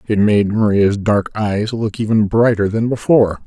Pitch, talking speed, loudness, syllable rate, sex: 105 Hz, 175 wpm, -15 LUFS, 4.7 syllables/s, male